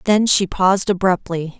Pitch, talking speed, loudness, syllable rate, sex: 190 Hz, 150 wpm, -17 LUFS, 4.8 syllables/s, female